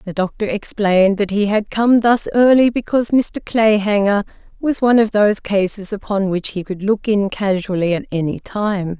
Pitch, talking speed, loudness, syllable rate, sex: 205 Hz, 180 wpm, -17 LUFS, 5.0 syllables/s, female